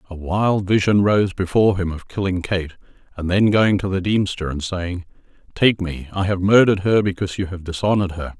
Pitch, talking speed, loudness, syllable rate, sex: 95 Hz, 200 wpm, -19 LUFS, 5.6 syllables/s, male